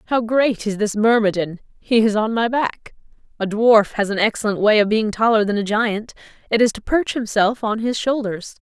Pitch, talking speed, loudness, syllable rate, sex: 220 Hz, 210 wpm, -18 LUFS, 5.0 syllables/s, female